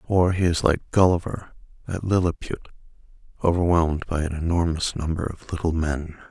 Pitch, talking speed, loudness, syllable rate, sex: 85 Hz, 145 wpm, -23 LUFS, 5.2 syllables/s, male